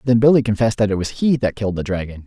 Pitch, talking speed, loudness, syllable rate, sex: 110 Hz, 290 wpm, -18 LUFS, 7.5 syllables/s, male